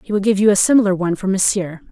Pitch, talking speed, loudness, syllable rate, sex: 195 Hz, 285 wpm, -16 LUFS, 7.5 syllables/s, female